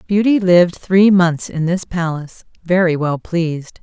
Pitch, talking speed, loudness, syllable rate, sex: 175 Hz, 155 wpm, -15 LUFS, 4.6 syllables/s, female